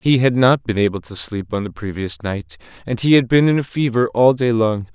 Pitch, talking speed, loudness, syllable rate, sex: 115 Hz, 255 wpm, -18 LUFS, 5.2 syllables/s, male